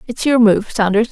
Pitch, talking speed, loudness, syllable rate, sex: 220 Hz, 215 wpm, -14 LUFS, 5.1 syllables/s, female